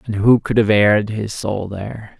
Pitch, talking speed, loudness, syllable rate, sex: 105 Hz, 220 wpm, -17 LUFS, 4.9 syllables/s, male